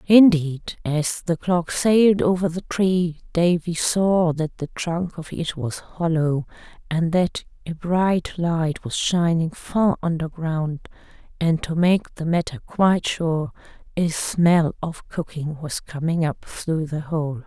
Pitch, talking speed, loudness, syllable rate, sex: 165 Hz, 150 wpm, -22 LUFS, 3.6 syllables/s, female